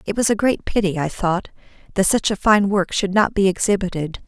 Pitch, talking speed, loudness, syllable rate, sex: 195 Hz, 225 wpm, -19 LUFS, 5.4 syllables/s, female